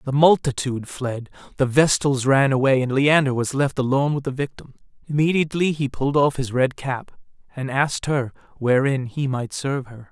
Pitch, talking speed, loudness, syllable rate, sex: 135 Hz, 180 wpm, -21 LUFS, 5.4 syllables/s, male